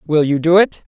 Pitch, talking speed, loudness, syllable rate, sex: 165 Hz, 250 wpm, -14 LUFS, 5.6 syllables/s, female